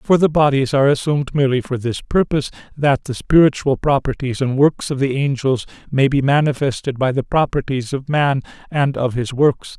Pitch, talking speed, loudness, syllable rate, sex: 135 Hz, 185 wpm, -18 LUFS, 5.4 syllables/s, male